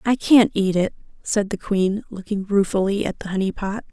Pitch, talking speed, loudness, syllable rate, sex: 200 Hz, 200 wpm, -21 LUFS, 5.0 syllables/s, female